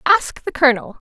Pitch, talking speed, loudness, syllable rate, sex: 275 Hz, 165 wpm, -17 LUFS, 5.4 syllables/s, female